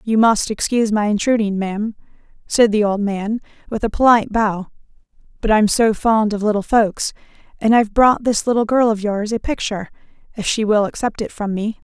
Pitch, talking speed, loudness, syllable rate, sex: 215 Hz, 190 wpm, -18 LUFS, 5.5 syllables/s, female